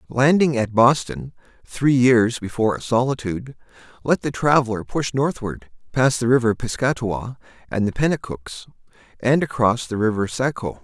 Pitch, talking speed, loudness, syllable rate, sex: 120 Hz, 140 wpm, -20 LUFS, 4.9 syllables/s, male